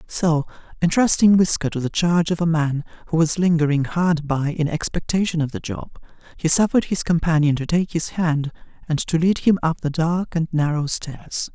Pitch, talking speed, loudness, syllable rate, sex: 160 Hz, 190 wpm, -20 LUFS, 5.1 syllables/s, male